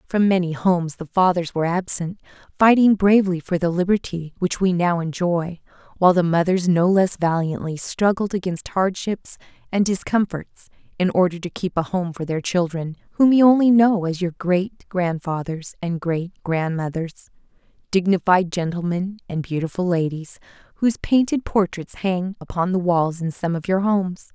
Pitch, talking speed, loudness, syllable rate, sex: 180 Hz, 160 wpm, -21 LUFS, 5.0 syllables/s, female